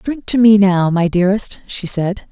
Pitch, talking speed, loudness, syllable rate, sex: 195 Hz, 210 wpm, -14 LUFS, 4.5 syllables/s, female